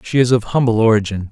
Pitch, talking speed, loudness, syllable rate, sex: 115 Hz, 230 wpm, -15 LUFS, 6.6 syllables/s, male